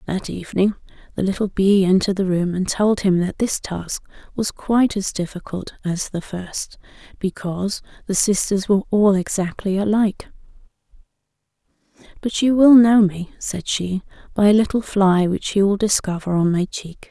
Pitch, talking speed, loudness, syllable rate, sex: 195 Hz, 160 wpm, -19 LUFS, 5.0 syllables/s, female